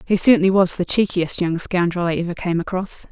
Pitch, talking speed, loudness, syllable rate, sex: 180 Hz, 210 wpm, -19 LUFS, 5.7 syllables/s, female